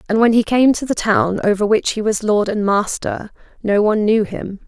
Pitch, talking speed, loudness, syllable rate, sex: 210 Hz, 230 wpm, -16 LUFS, 5.1 syllables/s, female